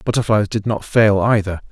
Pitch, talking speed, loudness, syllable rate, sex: 105 Hz, 175 wpm, -17 LUFS, 5.2 syllables/s, male